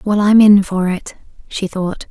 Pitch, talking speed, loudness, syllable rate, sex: 195 Hz, 200 wpm, -14 LUFS, 4.1 syllables/s, female